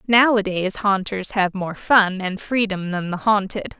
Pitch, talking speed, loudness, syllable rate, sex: 200 Hz, 160 wpm, -20 LUFS, 4.1 syllables/s, female